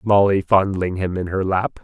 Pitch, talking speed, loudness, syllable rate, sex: 95 Hz, 195 wpm, -19 LUFS, 4.7 syllables/s, male